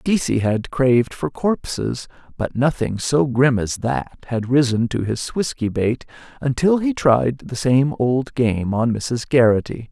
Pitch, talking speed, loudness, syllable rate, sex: 125 Hz, 165 wpm, -20 LUFS, 4.0 syllables/s, male